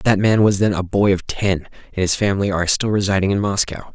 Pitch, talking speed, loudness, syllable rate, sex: 100 Hz, 245 wpm, -18 LUFS, 6.1 syllables/s, male